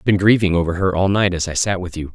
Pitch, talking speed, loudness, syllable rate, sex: 90 Hz, 335 wpm, -18 LUFS, 7.5 syllables/s, male